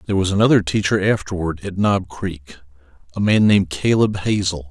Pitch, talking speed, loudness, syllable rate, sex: 95 Hz, 155 wpm, -18 LUFS, 5.6 syllables/s, male